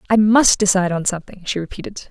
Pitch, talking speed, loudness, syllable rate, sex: 195 Hz, 200 wpm, -16 LUFS, 6.9 syllables/s, female